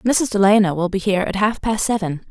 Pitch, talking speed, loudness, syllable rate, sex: 200 Hz, 235 wpm, -18 LUFS, 5.8 syllables/s, female